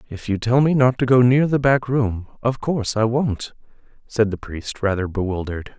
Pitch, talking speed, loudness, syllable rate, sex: 115 Hz, 205 wpm, -20 LUFS, 5.1 syllables/s, male